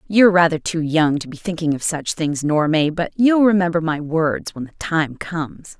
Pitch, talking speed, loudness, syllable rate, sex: 165 Hz, 215 wpm, -19 LUFS, 5.1 syllables/s, female